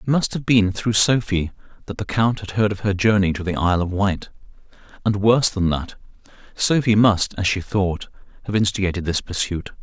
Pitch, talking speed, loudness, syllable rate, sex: 100 Hz, 195 wpm, -20 LUFS, 5.4 syllables/s, male